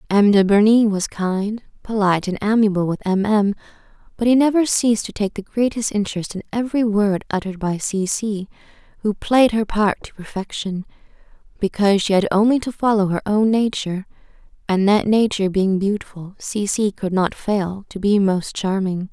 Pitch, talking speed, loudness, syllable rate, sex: 205 Hz, 175 wpm, -19 LUFS, 5.2 syllables/s, female